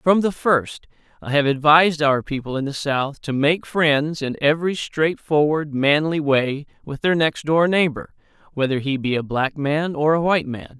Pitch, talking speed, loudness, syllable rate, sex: 150 Hz, 190 wpm, -20 LUFS, 4.6 syllables/s, male